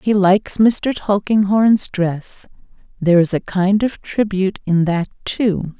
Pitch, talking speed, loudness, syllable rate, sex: 195 Hz, 145 wpm, -17 LUFS, 4.0 syllables/s, female